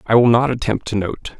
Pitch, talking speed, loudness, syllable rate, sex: 115 Hz, 260 wpm, -17 LUFS, 5.5 syllables/s, male